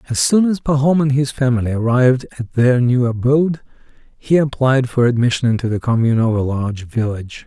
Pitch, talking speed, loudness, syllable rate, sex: 125 Hz, 185 wpm, -16 LUFS, 6.0 syllables/s, male